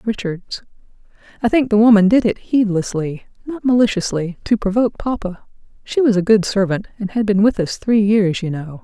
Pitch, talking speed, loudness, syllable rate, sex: 205 Hz, 185 wpm, -17 LUFS, 5.3 syllables/s, female